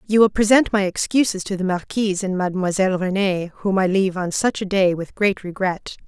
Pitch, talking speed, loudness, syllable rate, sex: 195 Hz, 205 wpm, -20 LUFS, 5.7 syllables/s, female